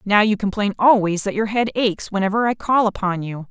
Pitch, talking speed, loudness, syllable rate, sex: 205 Hz, 225 wpm, -19 LUFS, 5.8 syllables/s, female